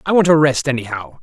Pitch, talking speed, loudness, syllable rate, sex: 140 Hz, 245 wpm, -15 LUFS, 6.4 syllables/s, male